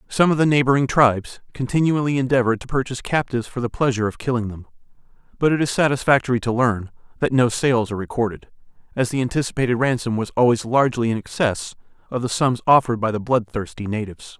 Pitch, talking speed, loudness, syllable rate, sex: 125 Hz, 185 wpm, -20 LUFS, 6.7 syllables/s, male